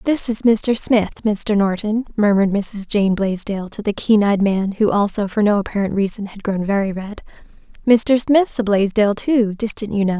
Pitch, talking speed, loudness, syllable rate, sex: 210 Hz, 190 wpm, -18 LUFS, 4.8 syllables/s, female